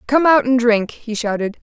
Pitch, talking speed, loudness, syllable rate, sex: 240 Hz, 210 wpm, -17 LUFS, 4.8 syllables/s, female